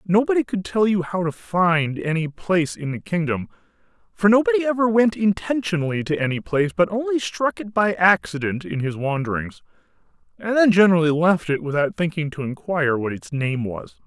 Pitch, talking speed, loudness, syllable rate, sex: 165 Hz, 180 wpm, -21 LUFS, 5.5 syllables/s, male